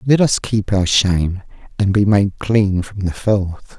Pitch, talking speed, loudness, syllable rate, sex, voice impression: 100 Hz, 190 wpm, -17 LUFS, 3.9 syllables/s, male, masculine, adult-like, tensed, weak, halting, sincere, calm, friendly, reassuring, kind, modest